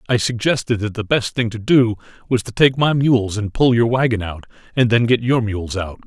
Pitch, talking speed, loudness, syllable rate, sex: 115 Hz, 235 wpm, -18 LUFS, 5.2 syllables/s, male